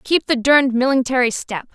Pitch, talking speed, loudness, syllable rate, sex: 255 Hz, 170 wpm, -17 LUFS, 5.6 syllables/s, female